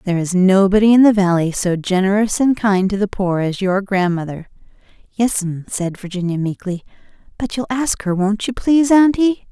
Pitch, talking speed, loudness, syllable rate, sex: 200 Hz, 175 wpm, -16 LUFS, 5.0 syllables/s, female